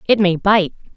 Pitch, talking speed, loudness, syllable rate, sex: 195 Hz, 190 wpm, -15 LUFS, 5.1 syllables/s, female